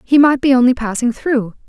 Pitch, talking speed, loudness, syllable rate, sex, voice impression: 250 Hz, 215 wpm, -14 LUFS, 5.4 syllables/s, female, very feminine, slightly young, slightly adult-like, very thin, slightly tensed, slightly weak, bright, slightly soft, very clear, very fluent, cute, very intellectual, refreshing, sincere, slightly calm, friendly, slightly reassuring, very unique, very elegant, sweet, very lively, slightly strict, intense, sharp